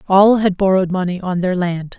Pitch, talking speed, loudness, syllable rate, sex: 185 Hz, 210 wpm, -16 LUFS, 5.5 syllables/s, female